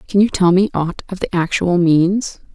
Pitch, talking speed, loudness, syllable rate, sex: 180 Hz, 210 wpm, -16 LUFS, 4.6 syllables/s, female